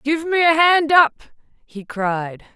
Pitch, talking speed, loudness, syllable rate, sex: 280 Hz, 165 wpm, -16 LUFS, 3.8 syllables/s, female